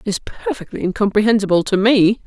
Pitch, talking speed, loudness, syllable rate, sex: 200 Hz, 160 wpm, -17 LUFS, 5.9 syllables/s, female